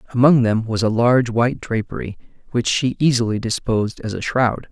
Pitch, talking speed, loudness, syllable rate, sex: 115 Hz, 180 wpm, -19 LUFS, 5.6 syllables/s, male